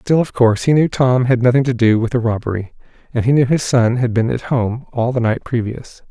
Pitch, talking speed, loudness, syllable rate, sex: 120 Hz, 255 wpm, -16 LUFS, 5.6 syllables/s, male